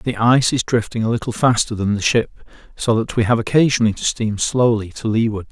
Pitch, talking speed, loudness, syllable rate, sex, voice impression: 115 Hz, 220 wpm, -18 LUFS, 6.0 syllables/s, male, very masculine, very adult-like, slightly old, very thick, relaxed, weak, slightly dark, slightly soft, slightly muffled, fluent, slightly raspy, cool, very intellectual, slightly refreshing, sincere, calm, friendly, reassuring, unique, slightly elegant, wild, slightly sweet, slightly lively, kind, modest